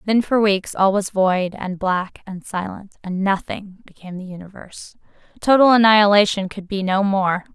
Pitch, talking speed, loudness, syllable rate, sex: 195 Hz, 165 wpm, -18 LUFS, 4.9 syllables/s, female